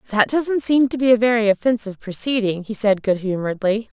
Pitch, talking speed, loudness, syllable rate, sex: 220 Hz, 195 wpm, -19 LUFS, 6.0 syllables/s, female